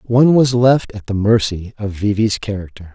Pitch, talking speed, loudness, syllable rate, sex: 110 Hz, 205 wpm, -16 LUFS, 4.9 syllables/s, male